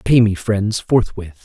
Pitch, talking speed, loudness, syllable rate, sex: 105 Hz, 165 wpm, -17 LUFS, 3.8 syllables/s, male